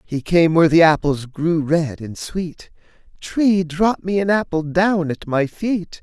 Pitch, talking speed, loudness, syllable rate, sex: 170 Hz, 180 wpm, -18 LUFS, 3.9 syllables/s, male